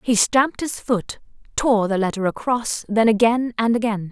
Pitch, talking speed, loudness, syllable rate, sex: 225 Hz, 175 wpm, -20 LUFS, 4.7 syllables/s, female